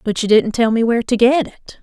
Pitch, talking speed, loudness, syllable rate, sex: 230 Hz, 295 wpm, -15 LUFS, 5.8 syllables/s, female